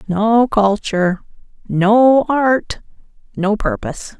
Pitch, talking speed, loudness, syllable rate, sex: 210 Hz, 85 wpm, -15 LUFS, 3.4 syllables/s, female